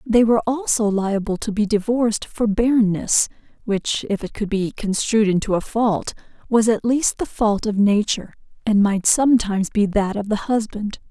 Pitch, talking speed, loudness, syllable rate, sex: 215 Hz, 180 wpm, -20 LUFS, 4.9 syllables/s, female